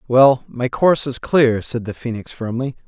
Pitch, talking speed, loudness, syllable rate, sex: 125 Hz, 190 wpm, -18 LUFS, 4.7 syllables/s, male